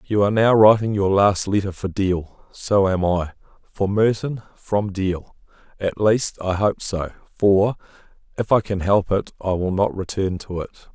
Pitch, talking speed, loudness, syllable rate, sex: 100 Hz, 180 wpm, -20 LUFS, 4.4 syllables/s, male